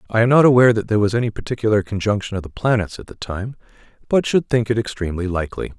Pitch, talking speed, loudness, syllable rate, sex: 110 Hz, 230 wpm, -19 LUFS, 7.3 syllables/s, male